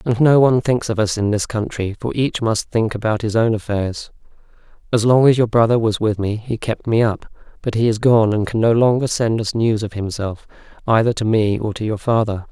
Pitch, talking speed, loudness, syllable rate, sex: 110 Hz, 235 wpm, -18 LUFS, 5.3 syllables/s, male